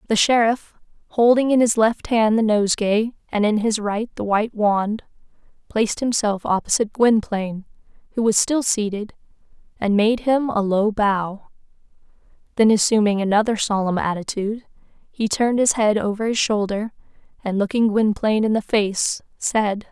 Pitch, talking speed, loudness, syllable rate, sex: 215 Hz, 150 wpm, -20 LUFS, 5.0 syllables/s, female